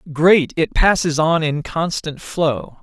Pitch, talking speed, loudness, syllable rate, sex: 160 Hz, 150 wpm, -18 LUFS, 3.2 syllables/s, male